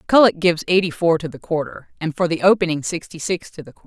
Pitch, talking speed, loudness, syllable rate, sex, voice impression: 165 Hz, 250 wpm, -19 LUFS, 6.6 syllables/s, female, feminine, adult-like, tensed, powerful, clear, fluent, intellectual, slightly elegant, lively, slightly strict, sharp